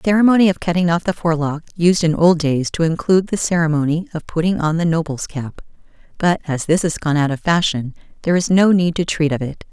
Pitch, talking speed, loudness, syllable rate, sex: 165 Hz, 230 wpm, -17 LUFS, 6.1 syllables/s, female